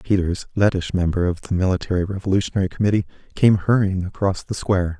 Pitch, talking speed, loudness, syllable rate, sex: 95 Hz, 155 wpm, -21 LUFS, 6.5 syllables/s, male